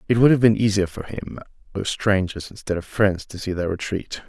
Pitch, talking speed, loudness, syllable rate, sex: 100 Hz, 225 wpm, -22 LUFS, 5.7 syllables/s, male